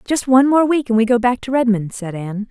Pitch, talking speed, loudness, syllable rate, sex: 240 Hz, 290 wpm, -16 LUFS, 6.2 syllables/s, female